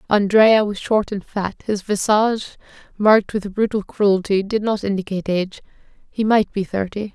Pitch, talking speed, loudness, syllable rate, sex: 205 Hz, 160 wpm, -19 LUFS, 5.1 syllables/s, female